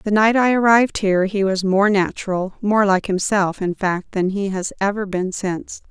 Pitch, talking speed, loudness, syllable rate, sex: 200 Hz, 205 wpm, -19 LUFS, 4.9 syllables/s, female